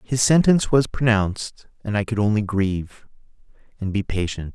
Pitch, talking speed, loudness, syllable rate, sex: 105 Hz, 160 wpm, -21 LUFS, 5.3 syllables/s, male